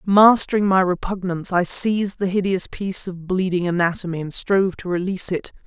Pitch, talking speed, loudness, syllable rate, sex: 185 Hz, 170 wpm, -20 LUFS, 5.7 syllables/s, female